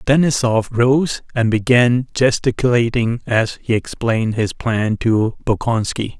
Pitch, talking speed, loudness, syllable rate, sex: 120 Hz, 115 wpm, -17 LUFS, 4.0 syllables/s, male